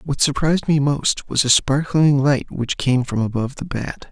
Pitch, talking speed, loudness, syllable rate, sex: 140 Hz, 205 wpm, -19 LUFS, 4.8 syllables/s, male